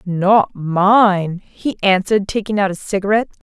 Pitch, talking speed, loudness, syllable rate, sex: 195 Hz, 135 wpm, -16 LUFS, 4.5 syllables/s, female